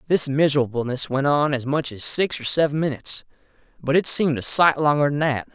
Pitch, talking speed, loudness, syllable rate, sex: 145 Hz, 205 wpm, -20 LUFS, 5.9 syllables/s, male